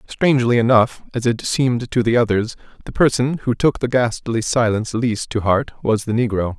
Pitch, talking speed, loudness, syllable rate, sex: 120 Hz, 190 wpm, -18 LUFS, 5.2 syllables/s, male